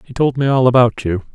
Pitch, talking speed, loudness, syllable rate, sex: 125 Hz, 270 wpm, -15 LUFS, 5.9 syllables/s, male